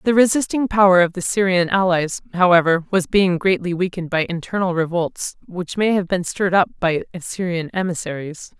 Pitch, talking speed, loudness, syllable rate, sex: 180 Hz, 170 wpm, -19 LUFS, 5.4 syllables/s, female